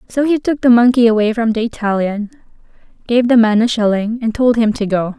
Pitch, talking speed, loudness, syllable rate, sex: 230 Hz, 220 wpm, -14 LUFS, 5.7 syllables/s, female